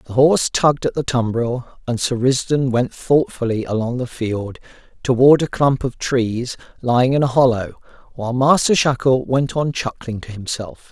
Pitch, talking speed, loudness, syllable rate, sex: 125 Hz, 170 wpm, -18 LUFS, 4.8 syllables/s, male